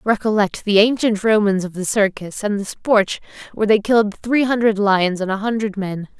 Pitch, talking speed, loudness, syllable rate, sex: 210 Hz, 195 wpm, -18 LUFS, 5.1 syllables/s, female